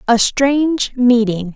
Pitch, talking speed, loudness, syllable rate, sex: 245 Hz, 115 wpm, -14 LUFS, 3.7 syllables/s, female